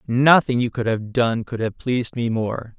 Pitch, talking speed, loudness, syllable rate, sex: 120 Hz, 215 wpm, -20 LUFS, 4.6 syllables/s, male